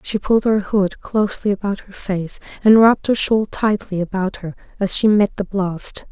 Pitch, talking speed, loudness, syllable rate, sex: 200 Hz, 195 wpm, -18 LUFS, 4.9 syllables/s, female